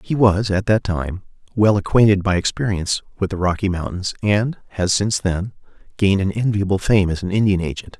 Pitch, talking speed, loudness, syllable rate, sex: 100 Hz, 190 wpm, -19 LUFS, 5.7 syllables/s, male